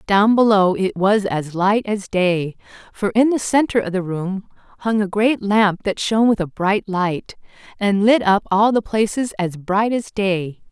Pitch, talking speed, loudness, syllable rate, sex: 200 Hz, 195 wpm, -18 LUFS, 4.3 syllables/s, female